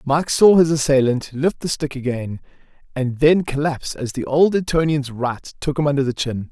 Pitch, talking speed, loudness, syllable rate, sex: 140 Hz, 195 wpm, -19 LUFS, 5.0 syllables/s, male